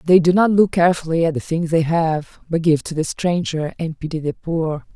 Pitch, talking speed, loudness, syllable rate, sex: 165 Hz, 230 wpm, -19 LUFS, 5.2 syllables/s, female